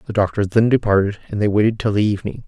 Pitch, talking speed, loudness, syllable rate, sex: 105 Hz, 240 wpm, -18 LUFS, 7.2 syllables/s, male